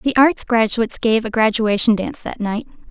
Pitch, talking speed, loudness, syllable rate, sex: 230 Hz, 185 wpm, -17 LUFS, 5.3 syllables/s, female